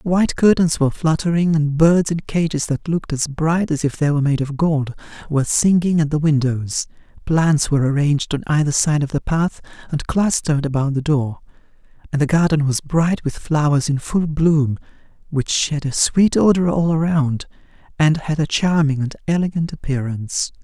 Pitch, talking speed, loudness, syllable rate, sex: 150 Hz, 180 wpm, -18 LUFS, 5.0 syllables/s, male